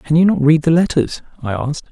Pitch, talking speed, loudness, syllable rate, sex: 150 Hz, 250 wpm, -15 LUFS, 6.1 syllables/s, male